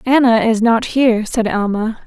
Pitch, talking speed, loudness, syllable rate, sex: 230 Hz, 175 wpm, -15 LUFS, 4.7 syllables/s, female